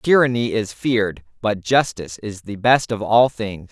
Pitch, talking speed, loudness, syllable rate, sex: 110 Hz, 180 wpm, -19 LUFS, 4.6 syllables/s, male